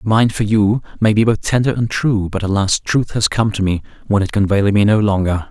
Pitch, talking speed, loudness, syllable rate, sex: 105 Hz, 250 wpm, -16 LUFS, 5.5 syllables/s, male